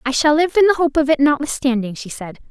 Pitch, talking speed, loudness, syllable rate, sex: 280 Hz, 265 wpm, -16 LUFS, 6.3 syllables/s, female